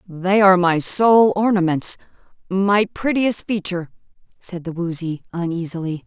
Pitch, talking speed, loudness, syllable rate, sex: 185 Hz, 120 wpm, -19 LUFS, 4.5 syllables/s, female